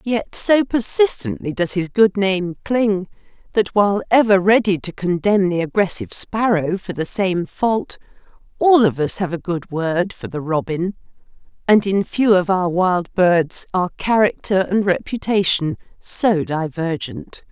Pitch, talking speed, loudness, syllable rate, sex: 190 Hz, 150 wpm, -18 LUFS, 4.2 syllables/s, female